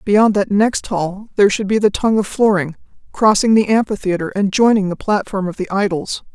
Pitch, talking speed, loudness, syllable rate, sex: 200 Hz, 200 wpm, -16 LUFS, 5.4 syllables/s, female